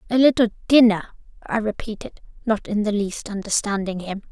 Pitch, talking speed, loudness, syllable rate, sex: 215 Hz, 155 wpm, -21 LUFS, 5.7 syllables/s, female